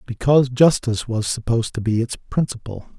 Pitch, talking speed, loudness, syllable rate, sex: 120 Hz, 160 wpm, -20 LUFS, 5.8 syllables/s, male